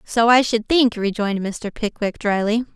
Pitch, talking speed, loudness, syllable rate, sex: 220 Hz, 175 wpm, -19 LUFS, 4.7 syllables/s, female